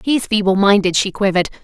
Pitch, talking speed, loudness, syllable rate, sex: 200 Hz, 185 wpm, -15 LUFS, 6.4 syllables/s, female